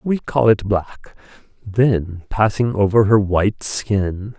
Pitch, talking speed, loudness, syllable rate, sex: 105 Hz, 135 wpm, -18 LUFS, 3.7 syllables/s, male